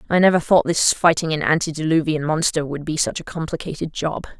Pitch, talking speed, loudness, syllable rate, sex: 160 Hz, 190 wpm, -20 LUFS, 5.9 syllables/s, female